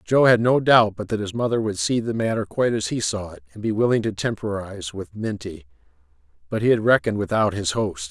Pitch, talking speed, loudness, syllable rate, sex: 110 Hz, 230 wpm, -22 LUFS, 6.0 syllables/s, male